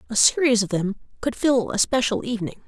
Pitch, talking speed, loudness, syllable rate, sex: 230 Hz, 200 wpm, -22 LUFS, 5.8 syllables/s, female